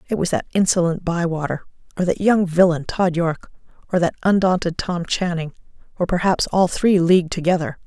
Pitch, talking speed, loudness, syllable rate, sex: 175 Hz, 145 wpm, -19 LUFS, 5.5 syllables/s, female